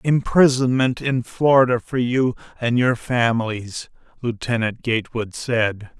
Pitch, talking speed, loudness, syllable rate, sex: 120 Hz, 110 wpm, -20 LUFS, 4.1 syllables/s, male